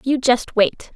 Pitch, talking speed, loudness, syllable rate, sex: 250 Hz, 190 wpm, -18 LUFS, 3.6 syllables/s, female